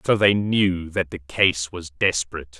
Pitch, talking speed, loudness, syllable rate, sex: 85 Hz, 185 wpm, -21 LUFS, 4.4 syllables/s, male